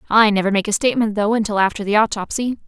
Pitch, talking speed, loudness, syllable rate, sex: 215 Hz, 225 wpm, -18 LUFS, 7.1 syllables/s, female